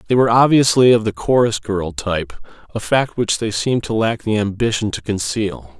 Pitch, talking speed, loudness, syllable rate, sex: 110 Hz, 195 wpm, -17 LUFS, 5.4 syllables/s, male